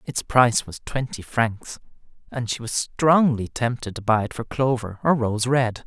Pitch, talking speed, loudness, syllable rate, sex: 120 Hz, 185 wpm, -22 LUFS, 4.4 syllables/s, male